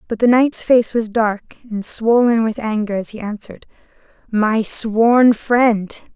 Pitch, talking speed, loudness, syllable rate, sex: 225 Hz, 155 wpm, -16 LUFS, 4.0 syllables/s, female